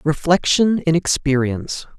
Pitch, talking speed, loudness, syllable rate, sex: 155 Hz, 90 wpm, -18 LUFS, 4.4 syllables/s, male